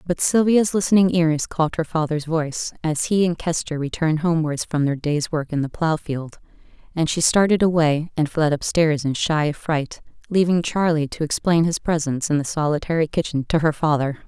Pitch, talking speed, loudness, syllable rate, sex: 160 Hz, 190 wpm, -21 LUFS, 5.2 syllables/s, female